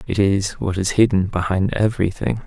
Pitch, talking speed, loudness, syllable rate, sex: 100 Hz, 170 wpm, -19 LUFS, 5.2 syllables/s, male